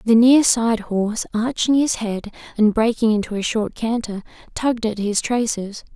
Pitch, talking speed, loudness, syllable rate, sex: 220 Hz, 170 wpm, -19 LUFS, 4.7 syllables/s, female